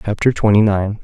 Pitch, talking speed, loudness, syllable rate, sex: 105 Hz, 175 wpm, -15 LUFS, 5.5 syllables/s, male